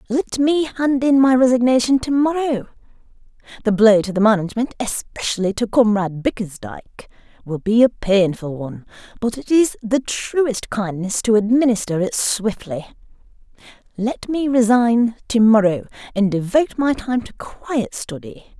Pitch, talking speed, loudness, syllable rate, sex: 230 Hz, 135 wpm, -18 LUFS, 4.7 syllables/s, female